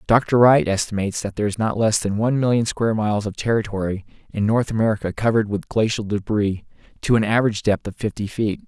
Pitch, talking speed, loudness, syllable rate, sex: 105 Hz, 200 wpm, -20 LUFS, 6.4 syllables/s, male